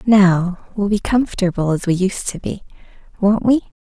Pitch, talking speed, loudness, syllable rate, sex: 195 Hz, 170 wpm, -18 LUFS, 4.9 syllables/s, female